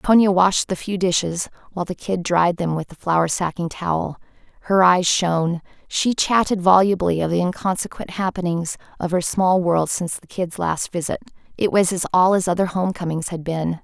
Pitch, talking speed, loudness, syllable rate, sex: 180 Hz, 190 wpm, -20 LUFS, 5.1 syllables/s, female